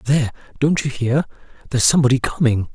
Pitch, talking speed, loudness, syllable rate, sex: 130 Hz, 155 wpm, -18 LUFS, 6.7 syllables/s, male